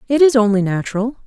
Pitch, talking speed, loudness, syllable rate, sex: 230 Hz, 190 wpm, -16 LUFS, 6.4 syllables/s, female